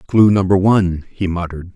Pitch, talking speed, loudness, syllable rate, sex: 95 Hz, 170 wpm, -15 LUFS, 5.8 syllables/s, male